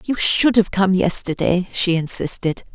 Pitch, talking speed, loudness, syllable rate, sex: 190 Hz, 155 wpm, -18 LUFS, 4.3 syllables/s, female